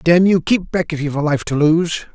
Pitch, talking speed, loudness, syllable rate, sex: 160 Hz, 280 wpm, -17 LUFS, 5.4 syllables/s, male